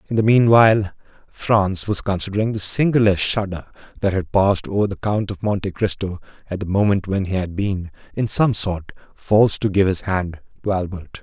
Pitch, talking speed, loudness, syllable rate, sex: 100 Hz, 185 wpm, -19 LUFS, 5.3 syllables/s, male